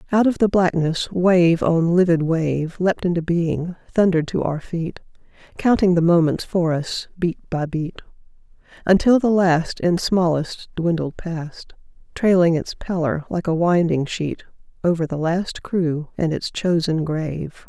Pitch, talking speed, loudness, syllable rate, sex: 170 Hz, 150 wpm, -20 LUFS, 4.1 syllables/s, female